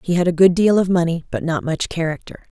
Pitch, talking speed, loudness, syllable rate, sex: 170 Hz, 255 wpm, -18 LUFS, 6.2 syllables/s, female